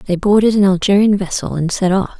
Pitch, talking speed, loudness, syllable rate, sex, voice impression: 195 Hz, 220 wpm, -14 LUFS, 5.6 syllables/s, female, feminine, adult-like, tensed, slightly bright, soft, slightly fluent, intellectual, calm, friendly, reassuring, elegant, kind, slightly modest